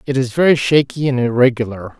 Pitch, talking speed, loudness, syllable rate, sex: 130 Hz, 180 wpm, -15 LUFS, 6.0 syllables/s, male